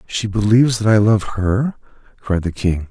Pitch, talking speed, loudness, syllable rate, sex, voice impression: 105 Hz, 185 wpm, -17 LUFS, 4.6 syllables/s, male, very masculine, very adult-like, thick, slightly muffled, cool, calm, wild, slightly sweet